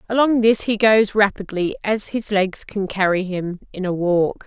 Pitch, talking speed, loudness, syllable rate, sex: 200 Hz, 175 wpm, -19 LUFS, 4.4 syllables/s, female